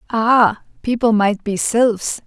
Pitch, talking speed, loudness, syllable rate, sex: 220 Hz, 130 wpm, -16 LUFS, 3.2 syllables/s, female